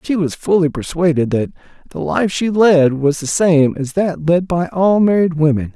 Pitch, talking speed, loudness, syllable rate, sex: 160 Hz, 200 wpm, -15 LUFS, 4.6 syllables/s, male